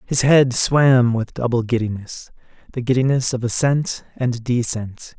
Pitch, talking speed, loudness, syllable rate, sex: 125 Hz, 125 wpm, -18 LUFS, 4.2 syllables/s, male